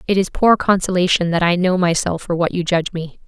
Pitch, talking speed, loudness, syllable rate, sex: 180 Hz, 240 wpm, -17 LUFS, 5.9 syllables/s, female